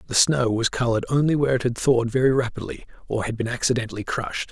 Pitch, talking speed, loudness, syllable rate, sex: 120 Hz, 215 wpm, -22 LUFS, 7.1 syllables/s, male